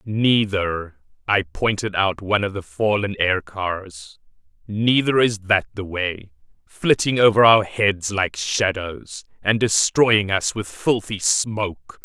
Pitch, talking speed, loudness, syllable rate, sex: 100 Hz, 135 wpm, -20 LUFS, 3.6 syllables/s, male